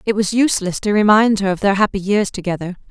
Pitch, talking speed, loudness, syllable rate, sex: 200 Hz, 230 wpm, -16 LUFS, 6.3 syllables/s, female